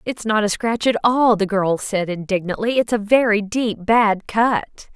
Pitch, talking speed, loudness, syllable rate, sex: 215 Hz, 195 wpm, -19 LUFS, 4.2 syllables/s, female